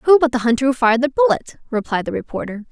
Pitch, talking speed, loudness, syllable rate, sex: 245 Hz, 245 wpm, -18 LUFS, 6.6 syllables/s, female